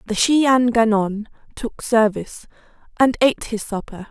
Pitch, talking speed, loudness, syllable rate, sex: 225 Hz, 145 wpm, -18 LUFS, 4.8 syllables/s, female